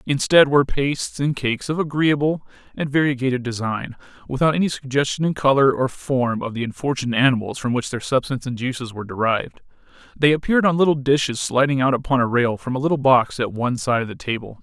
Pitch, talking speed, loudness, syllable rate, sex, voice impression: 135 Hz, 200 wpm, -20 LUFS, 6.4 syllables/s, male, very masculine, very adult-like, very thick, tensed, very powerful, bright, slightly hard, very clear, very fluent, cool, intellectual, very refreshing, sincere, calm, friendly, reassuring, unique, elegant, slightly wild, sweet, kind, slightly intense